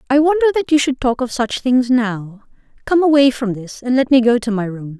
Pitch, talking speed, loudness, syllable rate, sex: 250 Hz, 250 wpm, -16 LUFS, 5.4 syllables/s, female